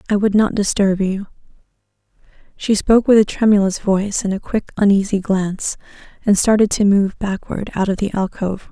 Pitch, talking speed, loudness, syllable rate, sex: 200 Hz, 170 wpm, -17 LUFS, 5.6 syllables/s, female